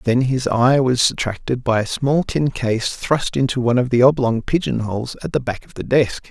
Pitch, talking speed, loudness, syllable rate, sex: 125 Hz, 230 wpm, -18 LUFS, 5.1 syllables/s, male